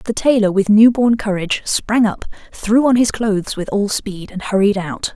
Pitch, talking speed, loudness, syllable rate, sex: 210 Hz, 210 wpm, -16 LUFS, 4.9 syllables/s, female